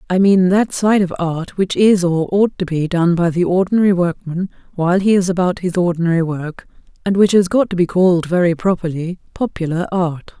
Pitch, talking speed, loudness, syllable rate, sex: 180 Hz, 200 wpm, -16 LUFS, 5.4 syllables/s, female